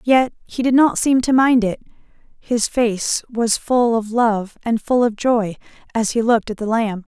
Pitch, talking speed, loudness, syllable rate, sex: 230 Hz, 200 wpm, -18 LUFS, 4.3 syllables/s, female